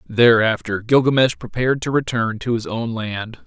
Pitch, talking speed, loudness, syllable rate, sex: 120 Hz, 155 wpm, -19 LUFS, 4.9 syllables/s, male